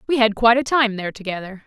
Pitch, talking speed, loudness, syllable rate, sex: 225 Hz, 255 wpm, -19 LUFS, 7.3 syllables/s, female